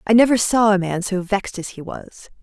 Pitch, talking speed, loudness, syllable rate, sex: 200 Hz, 245 wpm, -19 LUFS, 5.4 syllables/s, female